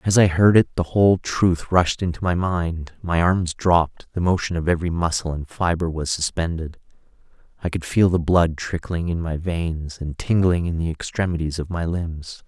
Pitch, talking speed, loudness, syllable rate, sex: 85 Hz, 190 wpm, -21 LUFS, 4.9 syllables/s, male